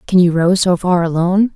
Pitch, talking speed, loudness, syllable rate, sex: 180 Hz, 230 wpm, -14 LUFS, 5.7 syllables/s, female